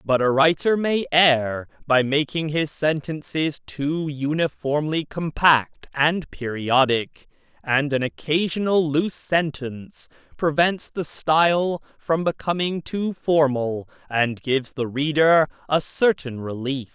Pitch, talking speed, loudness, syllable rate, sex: 150 Hz, 115 wpm, -22 LUFS, 3.8 syllables/s, male